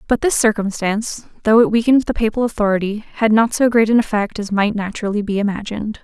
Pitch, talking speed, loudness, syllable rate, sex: 215 Hz, 200 wpm, -17 LUFS, 6.3 syllables/s, female